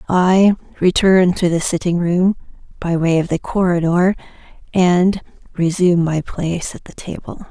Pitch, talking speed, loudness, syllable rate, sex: 175 Hz, 145 wpm, -16 LUFS, 3.8 syllables/s, female